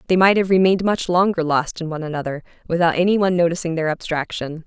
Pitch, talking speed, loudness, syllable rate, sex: 170 Hz, 205 wpm, -19 LUFS, 6.9 syllables/s, female